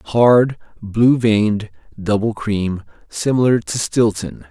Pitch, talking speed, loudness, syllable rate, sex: 110 Hz, 105 wpm, -17 LUFS, 3.5 syllables/s, male